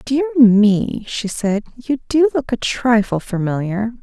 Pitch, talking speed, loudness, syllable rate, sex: 235 Hz, 150 wpm, -17 LUFS, 3.7 syllables/s, female